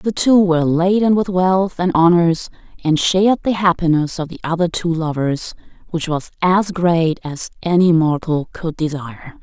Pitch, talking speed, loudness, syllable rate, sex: 170 Hz, 165 wpm, -17 LUFS, 4.6 syllables/s, female